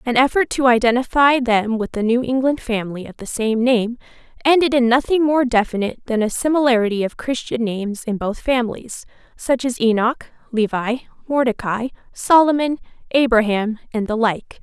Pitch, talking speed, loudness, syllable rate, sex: 240 Hz, 155 wpm, -18 LUFS, 5.3 syllables/s, female